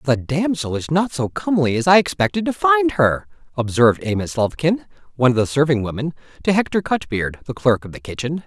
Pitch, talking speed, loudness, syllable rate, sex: 150 Hz, 200 wpm, -19 LUFS, 6.1 syllables/s, male